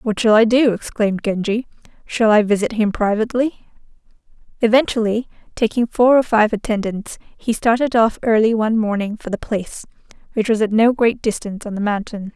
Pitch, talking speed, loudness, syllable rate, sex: 220 Hz, 170 wpm, -18 LUFS, 5.6 syllables/s, female